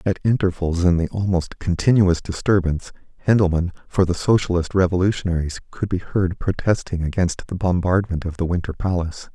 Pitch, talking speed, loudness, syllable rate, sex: 90 Hz, 150 wpm, -21 LUFS, 5.6 syllables/s, male